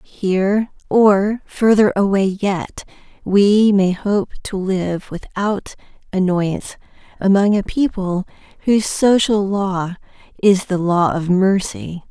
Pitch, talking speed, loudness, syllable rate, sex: 195 Hz, 115 wpm, -17 LUFS, 3.6 syllables/s, female